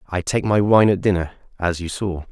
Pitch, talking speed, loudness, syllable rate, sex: 95 Hz, 235 wpm, -19 LUFS, 5.2 syllables/s, male